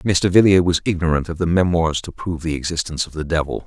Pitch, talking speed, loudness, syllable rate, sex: 85 Hz, 230 wpm, -19 LUFS, 6.4 syllables/s, male